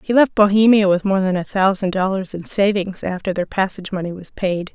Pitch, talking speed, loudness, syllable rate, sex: 190 Hz, 215 wpm, -18 LUFS, 5.6 syllables/s, female